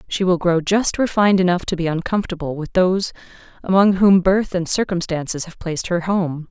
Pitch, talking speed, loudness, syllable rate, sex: 180 Hz, 185 wpm, -18 LUFS, 5.7 syllables/s, female